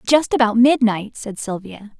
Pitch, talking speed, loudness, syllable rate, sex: 225 Hz, 150 wpm, -17 LUFS, 4.5 syllables/s, female